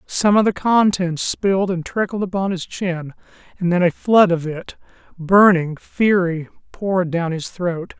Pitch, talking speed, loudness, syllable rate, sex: 180 Hz, 165 wpm, -18 LUFS, 4.3 syllables/s, male